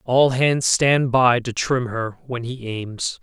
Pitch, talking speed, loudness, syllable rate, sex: 125 Hz, 185 wpm, -20 LUFS, 3.3 syllables/s, male